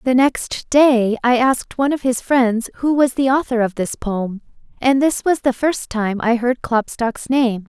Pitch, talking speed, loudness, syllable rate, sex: 250 Hz, 200 wpm, -18 LUFS, 4.3 syllables/s, female